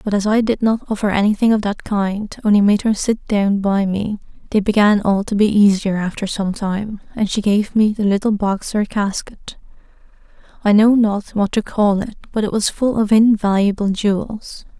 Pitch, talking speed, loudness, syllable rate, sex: 205 Hz, 200 wpm, -17 LUFS, 4.9 syllables/s, female